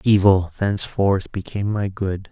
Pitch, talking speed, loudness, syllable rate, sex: 100 Hz, 130 wpm, -21 LUFS, 4.7 syllables/s, male